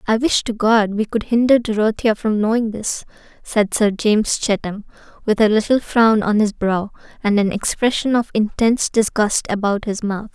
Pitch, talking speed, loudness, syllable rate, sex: 215 Hz, 180 wpm, -18 LUFS, 4.9 syllables/s, female